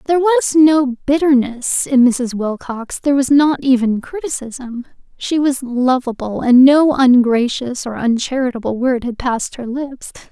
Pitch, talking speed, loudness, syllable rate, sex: 260 Hz, 145 wpm, -15 LUFS, 4.4 syllables/s, female